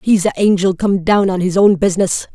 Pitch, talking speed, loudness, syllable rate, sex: 190 Hz, 230 wpm, -14 LUFS, 5.6 syllables/s, female